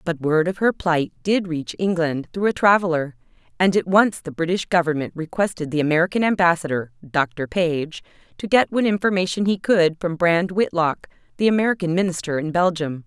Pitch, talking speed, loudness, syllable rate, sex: 175 Hz, 170 wpm, -20 LUFS, 5.3 syllables/s, female